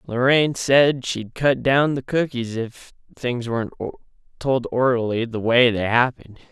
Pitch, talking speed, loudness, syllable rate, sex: 125 Hz, 145 wpm, -20 LUFS, 4.4 syllables/s, male